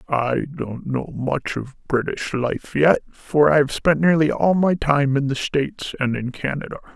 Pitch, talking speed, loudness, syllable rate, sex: 140 Hz, 190 wpm, -21 LUFS, 4.3 syllables/s, male